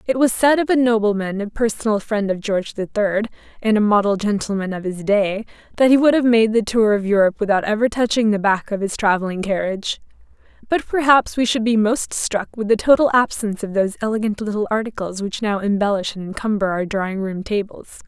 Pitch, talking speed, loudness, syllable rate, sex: 210 Hz, 210 wpm, -19 LUFS, 5.8 syllables/s, female